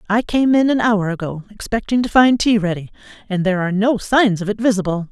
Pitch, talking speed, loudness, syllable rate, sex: 210 Hz, 225 wpm, -17 LUFS, 6.0 syllables/s, female